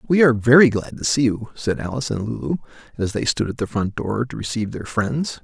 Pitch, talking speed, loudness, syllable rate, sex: 120 Hz, 245 wpm, -20 LUFS, 6.0 syllables/s, male